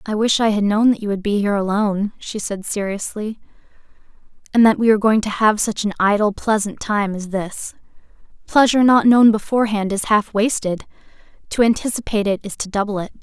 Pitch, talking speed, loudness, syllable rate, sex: 210 Hz, 190 wpm, -18 LUFS, 5.8 syllables/s, female